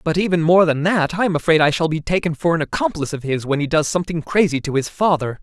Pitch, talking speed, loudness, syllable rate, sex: 160 Hz, 275 wpm, -18 LUFS, 6.6 syllables/s, male